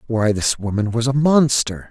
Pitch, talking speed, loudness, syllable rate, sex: 120 Hz, 190 wpm, -18 LUFS, 4.6 syllables/s, male